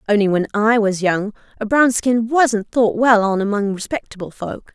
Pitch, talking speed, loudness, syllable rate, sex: 215 Hz, 190 wpm, -17 LUFS, 4.7 syllables/s, female